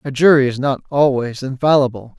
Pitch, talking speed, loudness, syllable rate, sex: 135 Hz, 165 wpm, -16 LUFS, 5.5 syllables/s, male